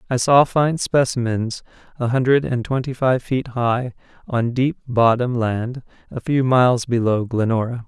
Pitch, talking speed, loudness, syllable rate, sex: 125 Hz, 150 wpm, -19 LUFS, 4.4 syllables/s, male